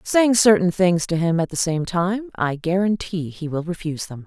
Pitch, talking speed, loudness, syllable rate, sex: 180 Hz, 210 wpm, -20 LUFS, 4.8 syllables/s, female